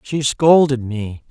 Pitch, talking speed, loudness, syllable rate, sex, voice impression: 130 Hz, 140 wpm, -16 LUFS, 3.4 syllables/s, male, masculine, adult-like, clear, slightly cool, slightly refreshing, sincere, friendly